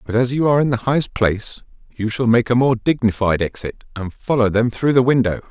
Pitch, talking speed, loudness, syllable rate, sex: 120 Hz, 230 wpm, -18 LUFS, 5.9 syllables/s, male